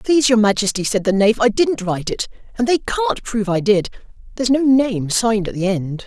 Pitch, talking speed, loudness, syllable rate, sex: 220 Hz, 225 wpm, -18 LUFS, 5.7 syllables/s, male